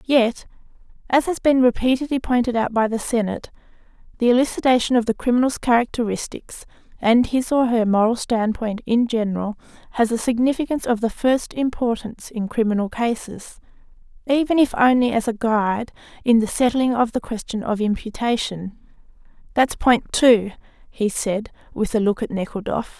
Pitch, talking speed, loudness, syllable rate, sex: 235 Hz, 150 wpm, -20 LUFS, 5.4 syllables/s, female